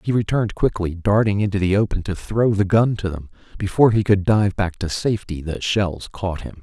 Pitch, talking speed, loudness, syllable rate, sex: 100 Hz, 215 wpm, -20 LUFS, 5.5 syllables/s, male